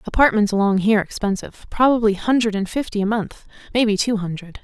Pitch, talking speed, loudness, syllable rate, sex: 210 Hz, 140 wpm, -19 LUFS, 6.2 syllables/s, female